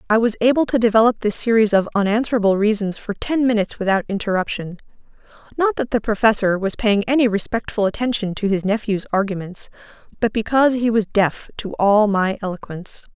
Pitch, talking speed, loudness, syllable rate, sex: 215 Hz, 170 wpm, -19 LUFS, 5.9 syllables/s, female